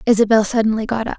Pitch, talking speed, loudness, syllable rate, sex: 220 Hz, 205 wpm, -17 LUFS, 7.6 syllables/s, female